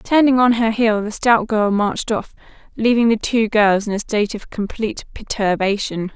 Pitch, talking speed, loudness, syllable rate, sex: 215 Hz, 185 wpm, -18 LUFS, 5.1 syllables/s, female